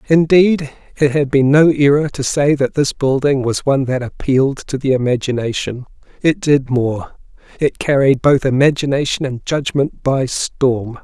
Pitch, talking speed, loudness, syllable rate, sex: 135 Hz, 150 wpm, -15 LUFS, 4.7 syllables/s, male